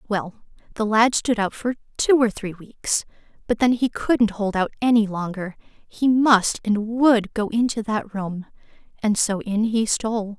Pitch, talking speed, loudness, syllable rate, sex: 220 Hz, 180 wpm, -21 LUFS, 4.1 syllables/s, female